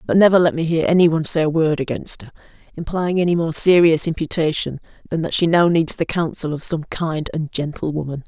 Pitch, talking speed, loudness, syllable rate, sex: 160 Hz, 220 wpm, -19 LUFS, 5.8 syllables/s, female